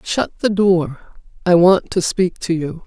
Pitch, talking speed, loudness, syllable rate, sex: 180 Hz, 190 wpm, -17 LUFS, 4.1 syllables/s, female